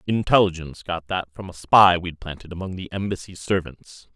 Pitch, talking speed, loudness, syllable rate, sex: 90 Hz, 175 wpm, -21 LUFS, 5.4 syllables/s, male